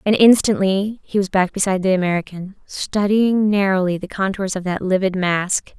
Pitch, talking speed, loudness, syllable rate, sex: 195 Hz, 165 wpm, -18 LUFS, 5.1 syllables/s, female